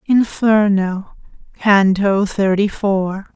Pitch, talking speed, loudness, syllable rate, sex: 200 Hz, 70 wpm, -16 LUFS, 2.9 syllables/s, female